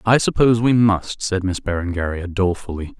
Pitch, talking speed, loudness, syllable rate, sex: 100 Hz, 160 wpm, -19 LUFS, 5.6 syllables/s, male